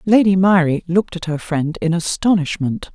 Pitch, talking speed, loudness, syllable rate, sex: 175 Hz, 165 wpm, -17 LUFS, 5.1 syllables/s, female